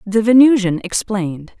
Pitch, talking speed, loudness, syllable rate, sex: 205 Hz, 115 wpm, -14 LUFS, 4.8 syllables/s, female